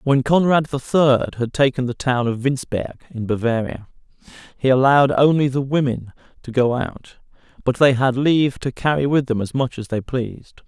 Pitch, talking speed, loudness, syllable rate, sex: 130 Hz, 185 wpm, -19 LUFS, 5.0 syllables/s, male